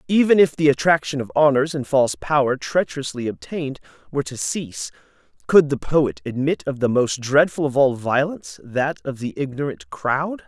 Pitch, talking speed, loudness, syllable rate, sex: 140 Hz, 170 wpm, -20 LUFS, 5.3 syllables/s, male